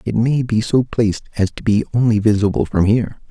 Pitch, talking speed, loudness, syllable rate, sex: 110 Hz, 220 wpm, -17 LUFS, 5.9 syllables/s, male